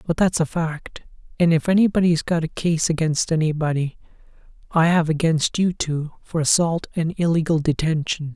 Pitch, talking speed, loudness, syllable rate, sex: 160 Hz, 150 wpm, -21 LUFS, 5.0 syllables/s, male